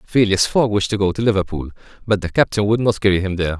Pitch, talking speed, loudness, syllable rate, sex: 100 Hz, 250 wpm, -18 LUFS, 6.8 syllables/s, male